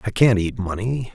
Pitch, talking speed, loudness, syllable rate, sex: 105 Hz, 210 wpm, -21 LUFS, 4.9 syllables/s, male